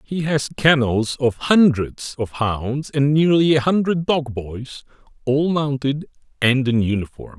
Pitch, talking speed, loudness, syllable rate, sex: 140 Hz, 140 wpm, -19 LUFS, 3.9 syllables/s, male